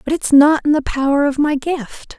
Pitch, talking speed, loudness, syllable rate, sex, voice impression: 290 Hz, 245 wpm, -15 LUFS, 4.9 syllables/s, female, feminine, adult-like, tensed, powerful, fluent, slightly raspy, intellectual, friendly, lively, sharp